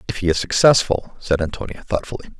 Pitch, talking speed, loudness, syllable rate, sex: 95 Hz, 175 wpm, -19 LUFS, 6.2 syllables/s, male